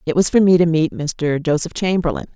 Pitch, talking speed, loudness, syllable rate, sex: 165 Hz, 230 wpm, -17 LUFS, 5.5 syllables/s, female